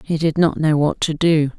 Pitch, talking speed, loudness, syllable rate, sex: 155 Hz, 265 wpm, -18 LUFS, 4.9 syllables/s, female